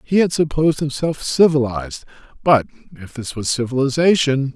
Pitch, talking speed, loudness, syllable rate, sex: 140 Hz, 130 wpm, -18 LUFS, 5.4 syllables/s, male